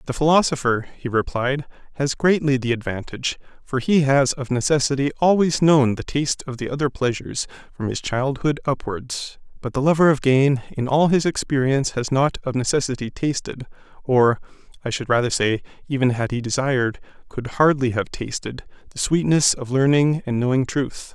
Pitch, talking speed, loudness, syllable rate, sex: 135 Hz, 160 wpm, -21 LUFS, 5.2 syllables/s, male